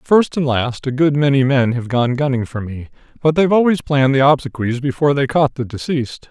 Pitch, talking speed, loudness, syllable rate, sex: 135 Hz, 220 wpm, -16 LUFS, 5.7 syllables/s, male